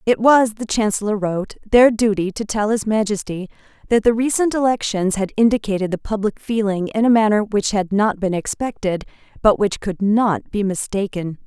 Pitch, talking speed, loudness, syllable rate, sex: 210 Hz, 180 wpm, -19 LUFS, 5.2 syllables/s, female